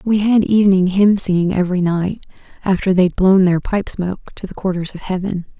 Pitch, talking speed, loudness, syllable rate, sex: 190 Hz, 195 wpm, -16 LUFS, 5.4 syllables/s, female